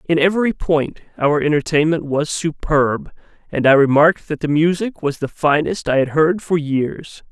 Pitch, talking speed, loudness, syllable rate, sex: 155 Hz, 170 wpm, -17 LUFS, 4.7 syllables/s, male